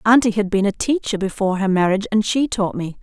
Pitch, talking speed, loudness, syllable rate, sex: 205 Hz, 240 wpm, -19 LUFS, 6.3 syllables/s, female